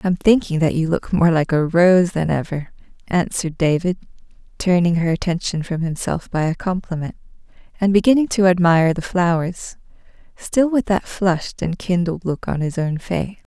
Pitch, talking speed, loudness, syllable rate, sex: 175 Hz, 175 wpm, -19 LUFS, 5.1 syllables/s, female